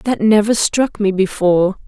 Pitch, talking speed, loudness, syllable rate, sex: 205 Hz, 160 wpm, -15 LUFS, 4.5 syllables/s, female